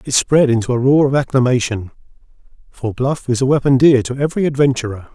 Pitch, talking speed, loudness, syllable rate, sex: 130 Hz, 185 wpm, -15 LUFS, 6.1 syllables/s, male